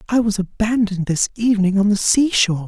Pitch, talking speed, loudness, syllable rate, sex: 205 Hz, 200 wpm, -17 LUFS, 6.2 syllables/s, male